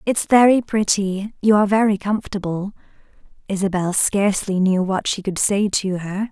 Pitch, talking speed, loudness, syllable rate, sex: 200 Hz, 145 wpm, -19 LUFS, 4.8 syllables/s, female